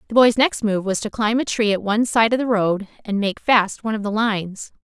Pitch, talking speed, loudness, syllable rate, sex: 215 Hz, 275 wpm, -19 LUFS, 5.7 syllables/s, female